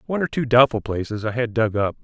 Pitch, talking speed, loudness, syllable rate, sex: 120 Hz, 265 wpm, -20 LUFS, 6.6 syllables/s, male